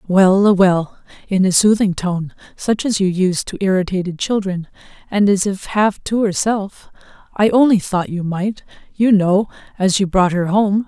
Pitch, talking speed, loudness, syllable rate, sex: 195 Hz, 175 wpm, -16 LUFS, 3.5 syllables/s, female